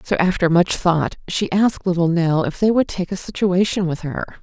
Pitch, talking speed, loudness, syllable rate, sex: 180 Hz, 215 wpm, -19 LUFS, 5.2 syllables/s, female